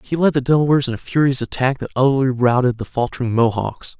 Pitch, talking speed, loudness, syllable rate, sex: 130 Hz, 210 wpm, -18 LUFS, 6.5 syllables/s, male